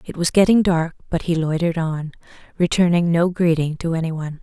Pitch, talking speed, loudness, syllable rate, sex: 170 Hz, 190 wpm, -19 LUFS, 5.9 syllables/s, female